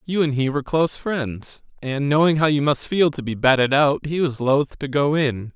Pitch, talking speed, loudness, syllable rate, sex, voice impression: 145 Hz, 240 wpm, -20 LUFS, 5.0 syllables/s, male, masculine, adult-like, slightly clear, slightly refreshing, sincere